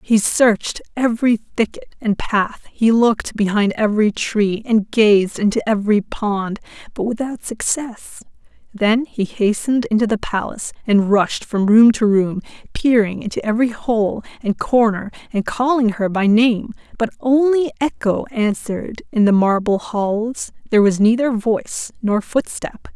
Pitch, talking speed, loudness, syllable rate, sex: 220 Hz, 145 wpm, -18 LUFS, 4.5 syllables/s, female